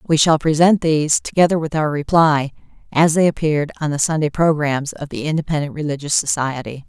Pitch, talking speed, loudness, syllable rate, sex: 155 Hz, 175 wpm, -17 LUFS, 5.8 syllables/s, female